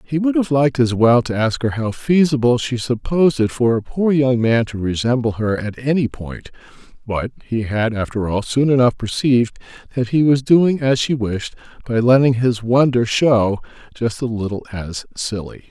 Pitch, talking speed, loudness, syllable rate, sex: 125 Hz, 190 wpm, -18 LUFS, 4.9 syllables/s, male